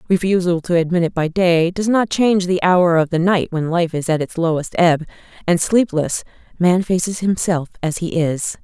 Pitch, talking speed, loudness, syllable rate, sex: 175 Hz, 200 wpm, -17 LUFS, 5.0 syllables/s, female